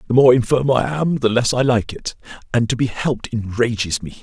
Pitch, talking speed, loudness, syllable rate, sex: 125 Hz, 215 wpm, -18 LUFS, 5.4 syllables/s, male